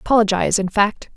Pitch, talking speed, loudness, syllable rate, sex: 210 Hz, 155 wpm, -18 LUFS, 5.8 syllables/s, female